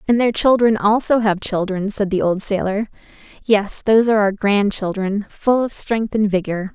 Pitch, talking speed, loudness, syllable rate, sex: 210 Hz, 185 wpm, -18 LUFS, 4.9 syllables/s, female